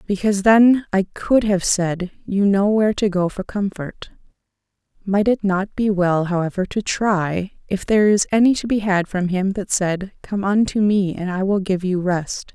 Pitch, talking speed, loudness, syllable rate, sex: 195 Hz, 190 wpm, -19 LUFS, 4.6 syllables/s, female